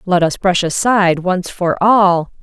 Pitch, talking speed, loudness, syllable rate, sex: 185 Hz, 175 wpm, -14 LUFS, 4.0 syllables/s, female